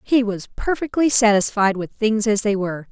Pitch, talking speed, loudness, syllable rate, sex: 220 Hz, 185 wpm, -19 LUFS, 5.1 syllables/s, female